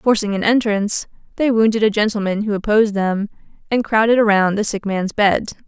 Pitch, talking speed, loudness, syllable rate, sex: 210 Hz, 180 wpm, -17 LUFS, 5.6 syllables/s, female